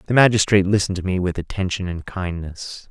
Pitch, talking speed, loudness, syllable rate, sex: 95 Hz, 185 wpm, -20 LUFS, 6.2 syllables/s, male